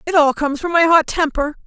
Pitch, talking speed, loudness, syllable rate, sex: 310 Hz, 255 wpm, -16 LUFS, 6.1 syllables/s, female